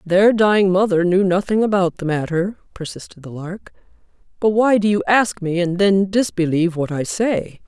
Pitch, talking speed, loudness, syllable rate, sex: 185 Hz, 180 wpm, -17 LUFS, 4.9 syllables/s, female